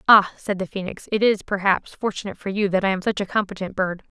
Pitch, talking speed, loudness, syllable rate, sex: 195 Hz, 245 wpm, -22 LUFS, 6.3 syllables/s, female